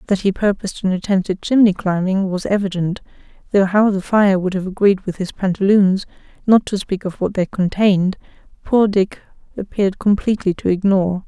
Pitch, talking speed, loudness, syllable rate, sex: 195 Hz, 175 wpm, -17 LUFS, 5.5 syllables/s, female